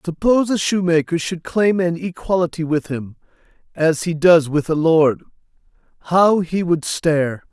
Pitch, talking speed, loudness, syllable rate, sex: 165 Hz, 150 wpm, -18 LUFS, 4.6 syllables/s, male